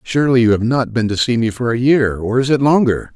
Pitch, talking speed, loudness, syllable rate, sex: 120 Hz, 285 wpm, -15 LUFS, 5.9 syllables/s, male